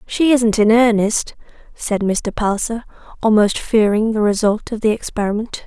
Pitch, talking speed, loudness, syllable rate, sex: 220 Hz, 150 wpm, -17 LUFS, 4.8 syllables/s, female